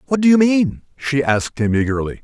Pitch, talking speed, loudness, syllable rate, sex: 145 Hz, 215 wpm, -17 LUFS, 5.9 syllables/s, male